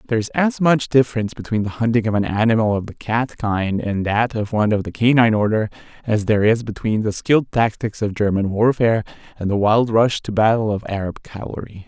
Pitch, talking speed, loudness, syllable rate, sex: 110 Hz, 210 wpm, -19 LUFS, 5.9 syllables/s, male